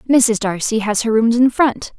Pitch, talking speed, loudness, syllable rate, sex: 230 Hz, 210 wpm, -16 LUFS, 4.6 syllables/s, female